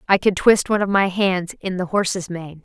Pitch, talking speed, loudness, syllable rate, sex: 190 Hz, 250 wpm, -19 LUFS, 5.4 syllables/s, female